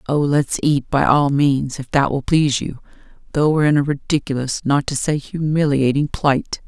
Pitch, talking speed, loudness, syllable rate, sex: 145 Hz, 190 wpm, -18 LUFS, 4.9 syllables/s, female